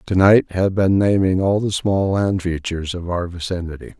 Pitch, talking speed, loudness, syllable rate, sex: 95 Hz, 195 wpm, -18 LUFS, 5.0 syllables/s, male